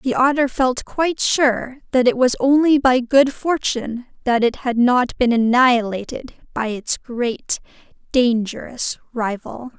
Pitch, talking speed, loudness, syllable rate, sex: 250 Hz, 140 wpm, -18 LUFS, 4.1 syllables/s, female